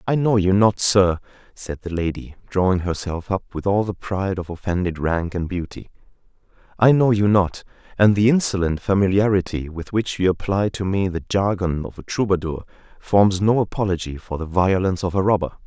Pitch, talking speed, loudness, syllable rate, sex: 95 Hz, 180 wpm, -20 LUFS, 5.3 syllables/s, male